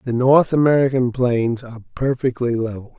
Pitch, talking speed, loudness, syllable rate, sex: 125 Hz, 140 wpm, -18 LUFS, 5.6 syllables/s, male